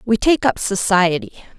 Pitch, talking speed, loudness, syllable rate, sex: 210 Hz, 150 wpm, -17 LUFS, 4.8 syllables/s, female